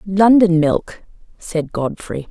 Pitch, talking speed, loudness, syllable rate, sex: 180 Hz, 105 wpm, -16 LUFS, 3.2 syllables/s, female